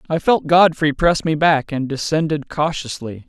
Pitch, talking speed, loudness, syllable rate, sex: 150 Hz, 165 wpm, -17 LUFS, 4.6 syllables/s, male